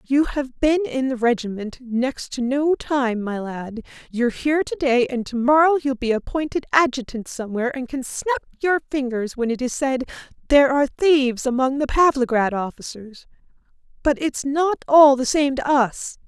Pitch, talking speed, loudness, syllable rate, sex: 265 Hz, 170 wpm, -20 LUFS, 5.0 syllables/s, female